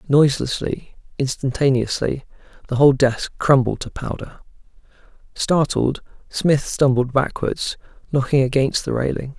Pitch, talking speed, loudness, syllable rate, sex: 135 Hz, 100 wpm, -20 LUFS, 4.6 syllables/s, male